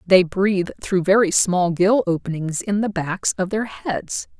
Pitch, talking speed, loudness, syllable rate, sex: 170 Hz, 180 wpm, -20 LUFS, 4.2 syllables/s, female